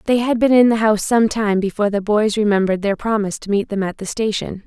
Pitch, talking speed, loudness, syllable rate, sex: 210 Hz, 255 wpm, -17 LUFS, 6.4 syllables/s, female